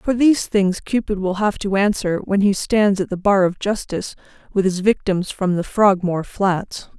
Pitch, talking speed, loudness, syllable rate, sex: 195 Hz, 200 wpm, -19 LUFS, 4.8 syllables/s, female